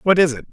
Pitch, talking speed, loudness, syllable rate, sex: 160 Hz, 345 wpm, -17 LUFS, 7.7 syllables/s, male